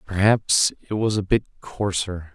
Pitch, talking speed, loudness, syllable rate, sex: 95 Hz, 155 wpm, -22 LUFS, 4.2 syllables/s, male